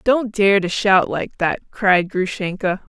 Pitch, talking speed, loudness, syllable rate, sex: 190 Hz, 165 wpm, -18 LUFS, 3.6 syllables/s, female